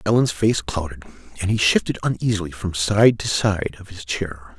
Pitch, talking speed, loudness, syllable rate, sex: 95 Hz, 185 wpm, -21 LUFS, 5.0 syllables/s, male